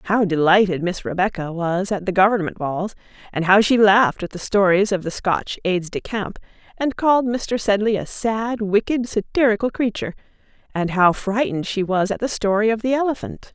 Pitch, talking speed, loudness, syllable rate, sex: 205 Hz, 185 wpm, -20 LUFS, 5.4 syllables/s, female